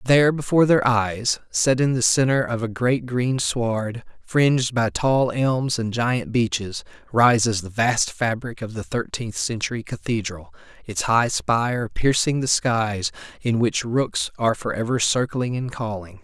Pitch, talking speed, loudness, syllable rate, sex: 120 Hz, 165 wpm, -22 LUFS, 4.3 syllables/s, male